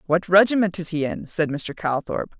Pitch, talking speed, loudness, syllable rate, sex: 170 Hz, 200 wpm, -22 LUFS, 5.0 syllables/s, female